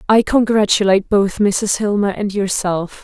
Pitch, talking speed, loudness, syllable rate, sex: 200 Hz, 140 wpm, -16 LUFS, 4.6 syllables/s, female